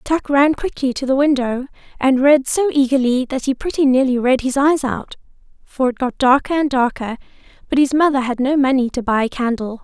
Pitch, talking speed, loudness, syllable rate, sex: 265 Hz, 205 wpm, -17 LUFS, 5.4 syllables/s, female